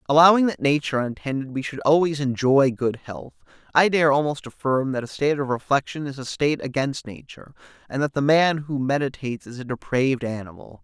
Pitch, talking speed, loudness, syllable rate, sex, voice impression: 135 Hz, 190 wpm, -22 LUFS, 5.9 syllables/s, male, masculine, adult-like, tensed, slightly bright, clear, slightly nasal, intellectual, friendly, slightly wild, lively, kind, slightly light